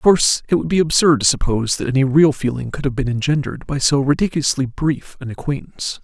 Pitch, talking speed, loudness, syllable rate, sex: 140 Hz, 220 wpm, -18 LUFS, 6.4 syllables/s, male